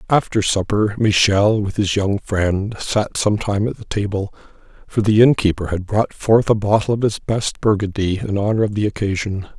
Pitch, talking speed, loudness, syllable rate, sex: 105 Hz, 190 wpm, -18 LUFS, 4.9 syllables/s, male